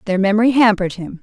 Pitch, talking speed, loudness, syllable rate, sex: 210 Hz, 195 wpm, -15 LUFS, 7.3 syllables/s, female